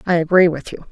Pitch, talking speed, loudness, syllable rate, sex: 170 Hz, 260 wpm, -15 LUFS, 6.4 syllables/s, female